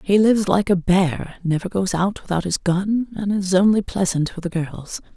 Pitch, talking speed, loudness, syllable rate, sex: 190 Hz, 210 wpm, -20 LUFS, 4.8 syllables/s, female